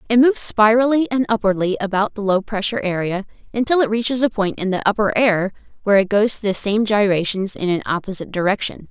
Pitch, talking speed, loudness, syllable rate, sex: 210 Hz, 200 wpm, -18 LUFS, 6.3 syllables/s, female